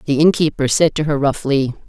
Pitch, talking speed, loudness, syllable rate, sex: 145 Hz, 190 wpm, -16 LUFS, 5.5 syllables/s, female